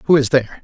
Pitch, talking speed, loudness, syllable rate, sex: 130 Hz, 285 wpm, -15 LUFS, 7.0 syllables/s, male